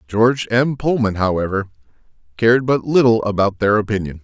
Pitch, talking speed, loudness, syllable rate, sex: 110 Hz, 140 wpm, -17 LUFS, 5.7 syllables/s, male